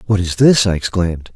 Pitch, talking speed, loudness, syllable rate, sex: 95 Hz, 220 wpm, -15 LUFS, 5.9 syllables/s, male